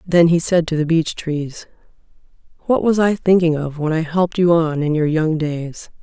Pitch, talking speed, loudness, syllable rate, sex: 165 Hz, 200 wpm, -17 LUFS, 4.7 syllables/s, female